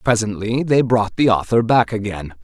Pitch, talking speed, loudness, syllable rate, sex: 110 Hz, 175 wpm, -18 LUFS, 4.8 syllables/s, male